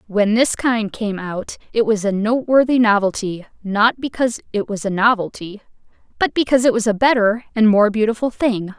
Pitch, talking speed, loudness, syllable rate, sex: 220 Hz, 180 wpm, -18 LUFS, 5.3 syllables/s, female